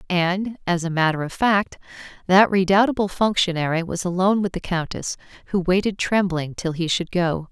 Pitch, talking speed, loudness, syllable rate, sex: 180 Hz, 170 wpm, -21 LUFS, 5.2 syllables/s, female